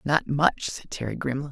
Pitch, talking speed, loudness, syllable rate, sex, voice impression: 140 Hz, 200 wpm, -26 LUFS, 5.2 syllables/s, female, feminine, slightly middle-aged, tensed, slightly powerful, slightly dark, hard, clear, slightly raspy, intellectual, calm, reassuring, elegant, slightly lively, slightly sharp